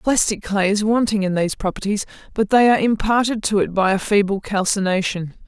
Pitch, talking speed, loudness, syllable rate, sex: 205 Hz, 185 wpm, -19 LUFS, 5.8 syllables/s, female